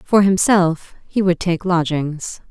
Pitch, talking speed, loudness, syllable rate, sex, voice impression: 175 Hz, 145 wpm, -17 LUFS, 3.6 syllables/s, female, feminine, middle-aged, tensed, slightly weak, slightly dark, clear, fluent, intellectual, calm, reassuring, elegant, lively, slightly strict